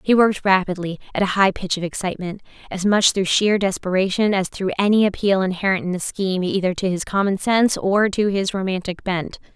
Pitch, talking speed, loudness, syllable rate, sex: 190 Hz, 195 wpm, -20 LUFS, 5.8 syllables/s, female